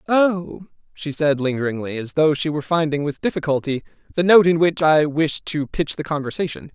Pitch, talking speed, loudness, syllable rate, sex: 155 Hz, 185 wpm, -20 LUFS, 5.4 syllables/s, male